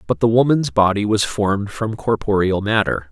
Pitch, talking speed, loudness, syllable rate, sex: 105 Hz, 175 wpm, -18 LUFS, 5.1 syllables/s, male